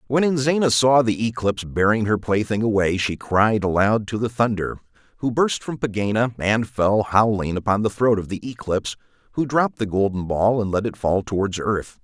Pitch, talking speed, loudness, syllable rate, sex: 110 Hz, 195 wpm, -21 LUFS, 5.2 syllables/s, male